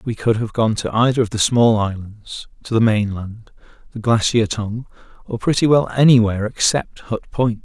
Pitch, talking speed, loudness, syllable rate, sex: 110 Hz, 180 wpm, -18 LUFS, 5.1 syllables/s, male